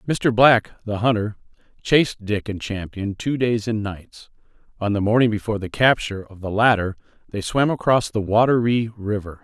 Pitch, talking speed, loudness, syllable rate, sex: 110 Hz, 180 wpm, -21 LUFS, 5.0 syllables/s, male